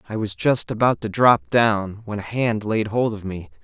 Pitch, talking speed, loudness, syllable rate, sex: 105 Hz, 230 wpm, -21 LUFS, 4.6 syllables/s, male